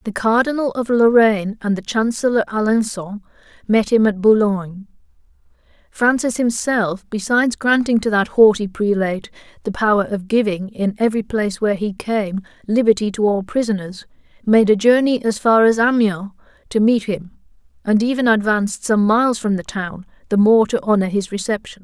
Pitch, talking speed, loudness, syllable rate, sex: 215 Hz, 160 wpm, -17 LUFS, 5.3 syllables/s, female